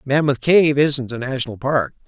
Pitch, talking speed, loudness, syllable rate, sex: 130 Hz, 175 wpm, -18 LUFS, 4.8 syllables/s, male